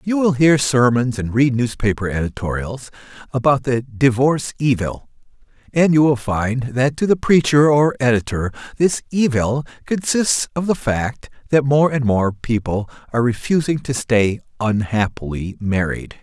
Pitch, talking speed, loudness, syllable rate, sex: 125 Hz, 145 wpm, -18 LUFS, 4.5 syllables/s, male